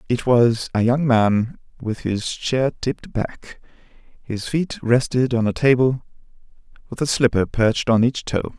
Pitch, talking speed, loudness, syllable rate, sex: 120 Hz, 160 wpm, -20 LUFS, 4.2 syllables/s, male